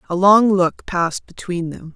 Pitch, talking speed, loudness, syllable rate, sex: 185 Hz, 185 wpm, -17 LUFS, 4.5 syllables/s, female